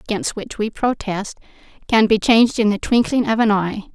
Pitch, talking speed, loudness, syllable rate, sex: 220 Hz, 200 wpm, -18 LUFS, 5.1 syllables/s, female